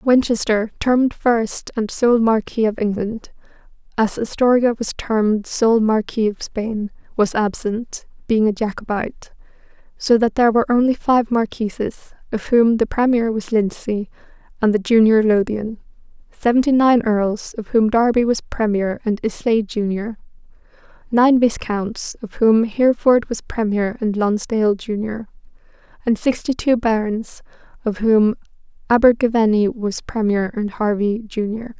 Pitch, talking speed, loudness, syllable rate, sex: 220 Hz, 135 wpm, -18 LUFS, 4.5 syllables/s, female